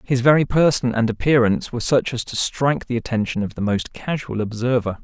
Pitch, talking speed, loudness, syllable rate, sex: 120 Hz, 200 wpm, -20 LUFS, 5.9 syllables/s, male